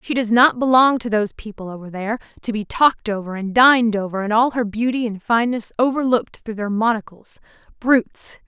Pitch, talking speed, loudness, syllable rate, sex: 225 Hz, 185 wpm, -18 LUFS, 5.9 syllables/s, female